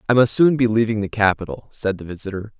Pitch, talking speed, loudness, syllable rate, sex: 110 Hz, 230 wpm, -19 LUFS, 6.4 syllables/s, male